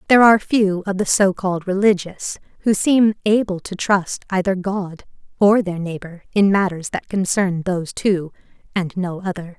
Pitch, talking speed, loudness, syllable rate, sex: 190 Hz, 165 wpm, -19 LUFS, 4.8 syllables/s, female